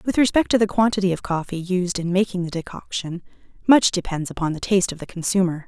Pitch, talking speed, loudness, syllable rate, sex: 185 Hz, 210 wpm, -21 LUFS, 6.2 syllables/s, female